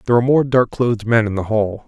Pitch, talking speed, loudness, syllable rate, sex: 115 Hz, 290 wpm, -17 LUFS, 7.0 syllables/s, male